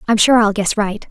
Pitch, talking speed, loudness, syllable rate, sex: 210 Hz, 270 wpm, -14 LUFS, 5.3 syllables/s, female